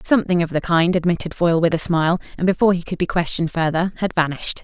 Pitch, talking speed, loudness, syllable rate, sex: 170 Hz, 235 wpm, -19 LUFS, 7.3 syllables/s, female